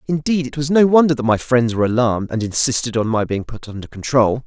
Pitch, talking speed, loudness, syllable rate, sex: 125 Hz, 240 wpm, -17 LUFS, 6.2 syllables/s, male